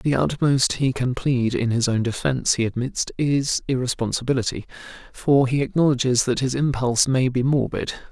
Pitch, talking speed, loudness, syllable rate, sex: 130 Hz, 165 wpm, -21 LUFS, 5.2 syllables/s, male